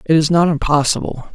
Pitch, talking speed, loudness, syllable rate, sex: 155 Hz, 180 wpm, -15 LUFS, 5.7 syllables/s, male